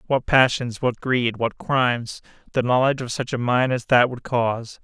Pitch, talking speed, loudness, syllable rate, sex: 125 Hz, 200 wpm, -21 LUFS, 4.8 syllables/s, male